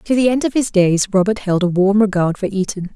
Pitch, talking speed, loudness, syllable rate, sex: 200 Hz, 265 wpm, -16 LUFS, 5.6 syllables/s, female